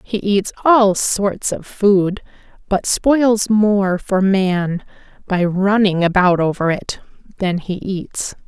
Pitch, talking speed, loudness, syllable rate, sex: 195 Hz, 135 wpm, -17 LUFS, 3.2 syllables/s, female